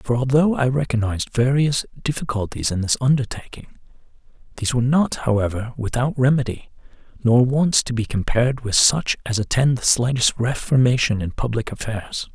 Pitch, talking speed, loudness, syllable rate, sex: 125 Hz, 145 wpm, -20 LUFS, 5.3 syllables/s, male